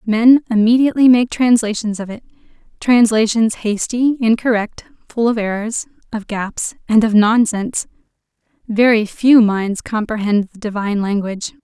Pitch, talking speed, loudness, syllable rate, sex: 225 Hz, 125 wpm, -15 LUFS, 4.8 syllables/s, female